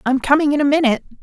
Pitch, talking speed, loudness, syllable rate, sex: 285 Hz, 245 wpm, -16 LUFS, 8.2 syllables/s, female